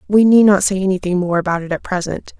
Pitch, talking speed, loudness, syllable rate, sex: 190 Hz, 250 wpm, -15 LUFS, 6.3 syllables/s, female